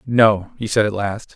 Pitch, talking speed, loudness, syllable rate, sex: 105 Hz, 220 wpm, -18 LUFS, 4.2 syllables/s, male